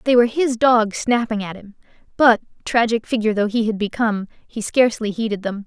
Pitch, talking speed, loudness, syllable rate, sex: 225 Hz, 190 wpm, -19 LUFS, 5.8 syllables/s, female